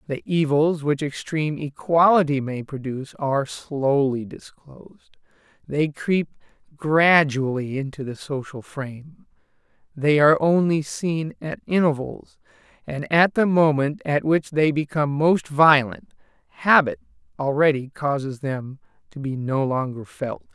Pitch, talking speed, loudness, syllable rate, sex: 145 Hz, 125 wpm, -21 LUFS, 4.2 syllables/s, male